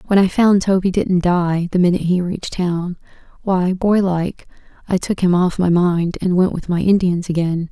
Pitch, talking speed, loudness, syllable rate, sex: 180 Hz, 195 wpm, -17 LUFS, 5.0 syllables/s, female